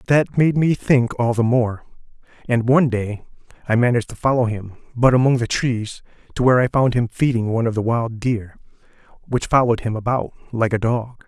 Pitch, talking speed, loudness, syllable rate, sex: 120 Hz, 195 wpm, -19 LUFS, 5.6 syllables/s, male